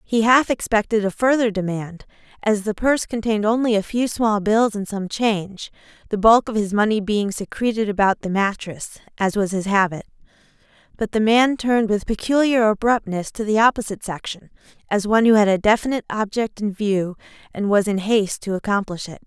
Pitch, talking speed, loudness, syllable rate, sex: 210 Hz, 185 wpm, -20 LUFS, 5.6 syllables/s, female